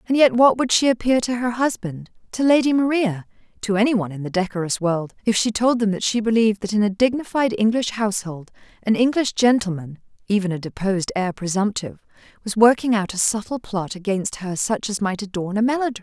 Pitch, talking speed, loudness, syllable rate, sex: 215 Hz, 200 wpm, -20 LUFS, 6.0 syllables/s, female